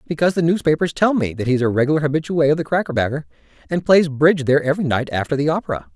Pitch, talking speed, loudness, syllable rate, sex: 150 Hz, 230 wpm, -18 LUFS, 7.7 syllables/s, male